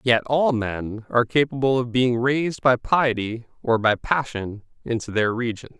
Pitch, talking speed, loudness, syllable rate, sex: 120 Hz, 165 wpm, -22 LUFS, 4.6 syllables/s, male